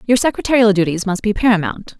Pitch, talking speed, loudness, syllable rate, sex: 210 Hz, 180 wpm, -16 LUFS, 6.6 syllables/s, female